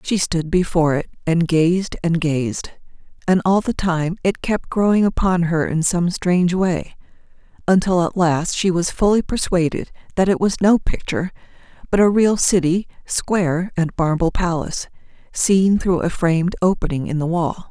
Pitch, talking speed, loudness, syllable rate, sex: 175 Hz, 165 wpm, -19 LUFS, 4.7 syllables/s, female